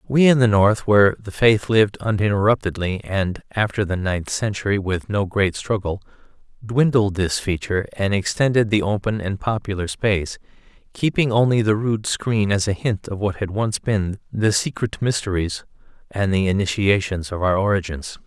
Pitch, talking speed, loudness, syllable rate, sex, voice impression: 100 Hz, 165 wpm, -20 LUFS, 4.9 syllables/s, male, masculine, adult-like, slightly middle-aged, slightly thick, slightly tensed, slightly weak, slightly bright, soft, clear, fluent, slightly raspy, cool, intellectual, slightly refreshing, slightly sincere, calm, friendly, reassuring, elegant, slightly sweet, kind, modest